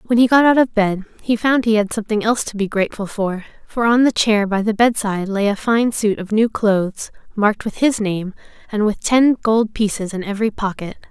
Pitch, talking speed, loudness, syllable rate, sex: 215 Hz, 225 wpm, -18 LUFS, 5.6 syllables/s, female